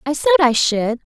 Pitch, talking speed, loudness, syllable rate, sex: 235 Hz, 210 wpm, -16 LUFS, 4.9 syllables/s, female